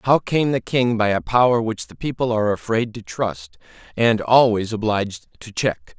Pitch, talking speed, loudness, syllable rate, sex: 110 Hz, 190 wpm, -20 LUFS, 4.8 syllables/s, male